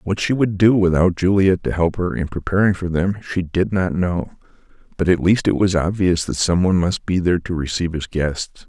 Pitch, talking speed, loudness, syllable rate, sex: 90 Hz, 230 wpm, -19 LUFS, 5.3 syllables/s, male